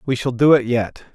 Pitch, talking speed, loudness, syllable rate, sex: 125 Hz, 260 wpm, -17 LUFS, 5.3 syllables/s, male